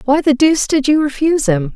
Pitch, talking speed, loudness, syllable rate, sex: 275 Hz, 240 wpm, -14 LUFS, 6.1 syllables/s, female